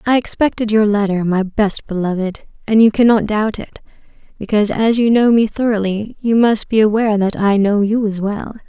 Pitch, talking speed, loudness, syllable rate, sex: 215 Hz, 195 wpm, -15 LUFS, 5.2 syllables/s, female